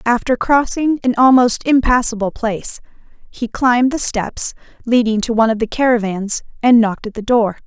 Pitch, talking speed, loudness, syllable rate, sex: 235 Hz, 165 wpm, -16 LUFS, 5.2 syllables/s, female